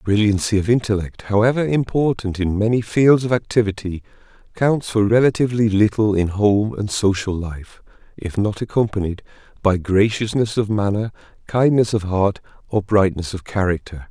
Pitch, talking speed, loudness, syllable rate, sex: 105 Hz, 135 wpm, -19 LUFS, 5.0 syllables/s, male